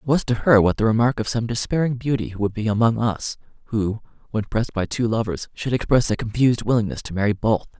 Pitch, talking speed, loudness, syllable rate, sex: 115 Hz, 225 wpm, -21 LUFS, 6.1 syllables/s, male